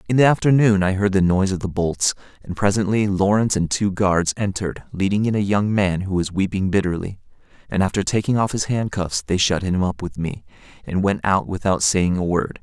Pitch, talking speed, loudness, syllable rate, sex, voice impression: 95 Hz, 215 wpm, -20 LUFS, 5.6 syllables/s, male, masculine, adult-like, fluent, cool, slightly refreshing, sincere, slightly calm